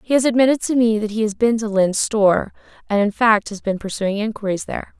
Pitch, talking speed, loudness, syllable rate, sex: 215 Hz, 240 wpm, -19 LUFS, 6.2 syllables/s, female